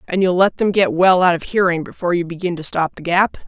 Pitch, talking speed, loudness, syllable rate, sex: 180 Hz, 275 wpm, -17 LUFS, 6.2 syllables/s, female